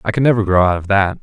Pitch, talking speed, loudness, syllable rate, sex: 100 Hz, 345 wpm, -15 LUFS, 7.2 syllables/s, male